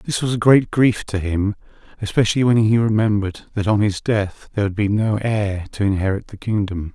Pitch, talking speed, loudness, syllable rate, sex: 105 Hz, 205 wpm, -19 LUFS, 5.5 syllables/s, male